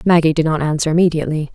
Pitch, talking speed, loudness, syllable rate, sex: 160 Hz, 195 wpm, -16 LUFS, 7.8 syllables/s, female